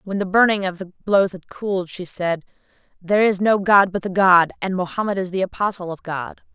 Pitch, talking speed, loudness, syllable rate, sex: 190 Hz, 220 wpm, -20 LUFS, 5.5 syllables/s, female